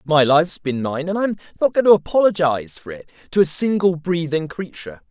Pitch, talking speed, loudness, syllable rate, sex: 165 Hz, 200 wpm, -18 LUFS, 5.7 syllables/s, male